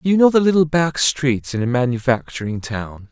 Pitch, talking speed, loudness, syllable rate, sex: 135 Hz, 210 wpm, -18 LUFS, 5.2 syllables/s, male